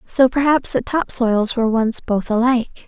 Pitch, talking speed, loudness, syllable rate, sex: 240 Hz, 190 wpm, -18 LUFS, 5.1 syllables/s, female